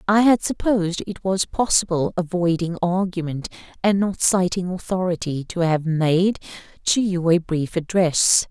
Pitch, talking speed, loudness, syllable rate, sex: 180 Hz, 140 wpm, -21 LUFS, 4.4 syllables/s, female